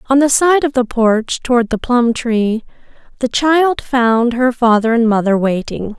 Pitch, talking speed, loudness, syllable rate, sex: 240 Hz, 180 wpm, -14 LUFS, 4.2 syllables/s, female